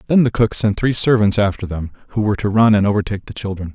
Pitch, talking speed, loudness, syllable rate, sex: 105 Hz, 255 wpm, -17 LUFS, 6.9 syllables/s, male